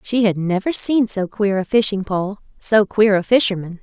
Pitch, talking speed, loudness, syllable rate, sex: 205 Hz, 190 wpm, -18 LUFS, 4.8 syllables/s, female